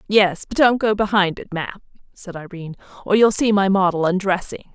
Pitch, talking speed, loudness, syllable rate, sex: 195 Hz, 190 wpm, -18 LUFS, 5.3 syllables/s, female